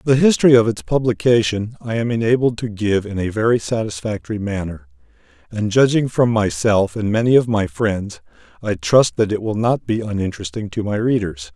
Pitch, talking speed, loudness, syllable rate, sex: 110 Hz, 180 wpm, -18 LUFS, 5.4 syllables/s, male